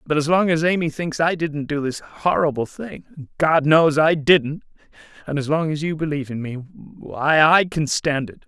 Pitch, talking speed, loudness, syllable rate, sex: 150 Hz, 190 wpm, -19 LUFS, 4.7 syllables/s, male